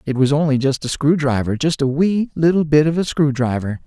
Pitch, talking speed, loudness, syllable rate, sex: 145 Hz, 200 wpm, -17 LUFS, 5.5 syllables/s, male